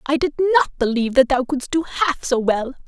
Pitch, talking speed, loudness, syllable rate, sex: 270 Hz, 230 wpm, -19 LUFS, 5.9 syllables/s, female